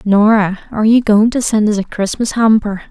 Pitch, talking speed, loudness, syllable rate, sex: 215 Hz, 205 wpm, -13 LUFS, 5.3 syllables/s, female